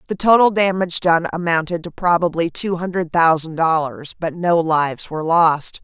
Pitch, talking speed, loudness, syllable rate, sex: 170 Hz, 165 wpm, -18 LUFS, 5.1 syllables/s, female